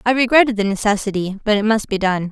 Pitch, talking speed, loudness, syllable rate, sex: 210 Hz, 235 wpm, -17 LUFS, 6.6 syllables/s, female